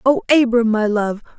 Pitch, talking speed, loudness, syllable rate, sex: 235 Hz, 175 wpm, -16 LUFS, 5.4 syllables/s, female